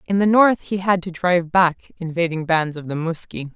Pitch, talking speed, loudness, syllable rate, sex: 175 Hz, 220 wpm, -19 LUFS, 5.2 syllables/s, female